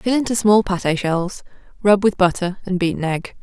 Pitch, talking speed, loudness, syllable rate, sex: 190 Hz, 195 wpm, -18 LUFS, 4.8 syllables/s, female